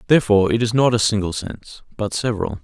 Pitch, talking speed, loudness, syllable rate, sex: 105 Hz, 205 wpm, -19 LUFS, 7.0 syllables/s, male